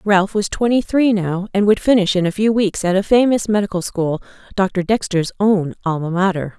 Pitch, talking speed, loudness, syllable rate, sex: 195 Hz, 190 wpm, -17 LUFS, 5.2 syllables/s, female